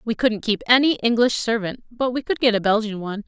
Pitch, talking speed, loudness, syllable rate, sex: 225 Hz, 240 wpm, -20 LUFS, 6.0 syllables/s, female